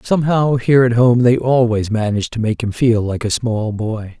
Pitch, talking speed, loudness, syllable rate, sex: 115 Hz, 215 wpm, -16 LUFS, 5.2 syllables/s, male